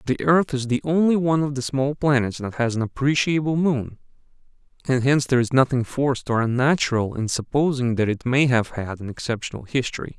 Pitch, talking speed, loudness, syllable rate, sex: 130 Hz, 195 wpm, -22 LUFS, 5.9 syllables/s, male